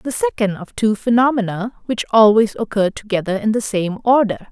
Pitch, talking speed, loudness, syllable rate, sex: 215 Hz, 175 wpm, -17 LUFS, 5.2 syllables/s, female